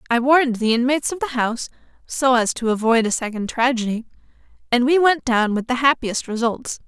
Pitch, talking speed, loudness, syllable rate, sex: 245 Hz, 190 wpm, -19 LUFS, 5.7 syllables/s, female